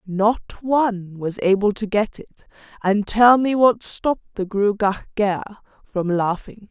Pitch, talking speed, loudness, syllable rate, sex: 210 Hz, 150 wpm, -20 LUFS, 4.4 syllables/s, female